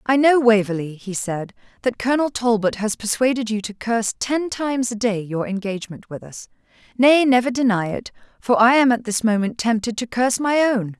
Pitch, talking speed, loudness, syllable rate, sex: 230 Hz, 195 wpm, -20 LUFS, 5.4 syllables/s, female